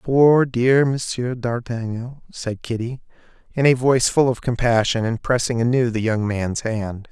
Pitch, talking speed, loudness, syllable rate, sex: 120 Hz, 160 wpm, -20 LUFS, 4.4 syllables/s, male